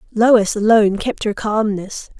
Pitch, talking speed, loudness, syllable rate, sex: 215 Hz, 135 wpm, -16 LUFS, 4.3 syllables/s, female